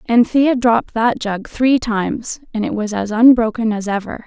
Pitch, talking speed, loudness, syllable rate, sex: 225 Hz, 185 wpm, -16 LUFS, 4.7 syllables/s, female